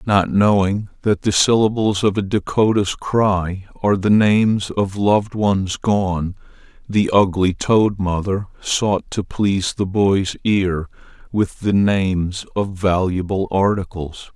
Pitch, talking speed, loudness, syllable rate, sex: 100 Hz, 135 wpm, -18 LUFS, 3.8 syllables/s, male